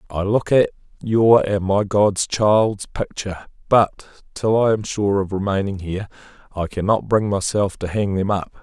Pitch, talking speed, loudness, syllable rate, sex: 100 Hz, 175 wpm, -19 LUFS, 4.5 syllables/s, male